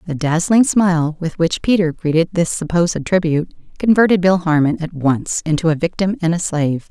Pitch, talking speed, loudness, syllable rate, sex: 170 Hz, 175 wpm, -16 LUFS, 5.3 syllables/s, female